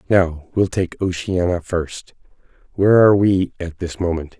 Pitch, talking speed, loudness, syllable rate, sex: 90 Hz, 150 wpm, -18 LUFS, 5.0 syllables/s, male